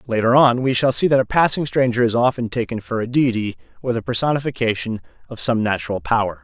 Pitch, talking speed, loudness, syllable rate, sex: 115 Hz, 205 wpm, -19 LUFS, 6.2 syllables/s, male